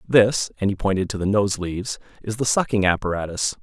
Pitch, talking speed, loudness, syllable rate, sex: 100 Hz, 200 wpm, -22 LUFS, 5.8 syllables/s, male